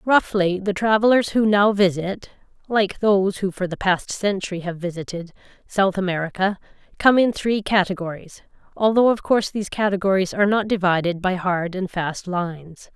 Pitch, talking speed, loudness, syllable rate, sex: 190 Hz, 155 wpm, -21 LUFS, 4.3 syllables/s, female